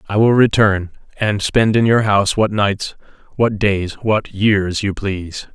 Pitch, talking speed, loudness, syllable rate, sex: 105 Hz, 150 wpm, -16 LUFS, 4.1 syllables/s, male